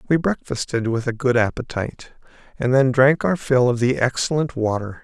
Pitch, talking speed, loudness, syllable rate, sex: 125 Hz, 180 wpm, -20 LUFS, 5.2 syllables/s, male